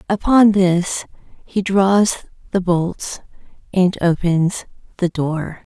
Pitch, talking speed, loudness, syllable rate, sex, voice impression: 185 Hz, 105 wpm, -18 LUFS, 3.0 syllables/s, female, feminine, adult-like, slightly soft, slightly calm, friendly, slightly kind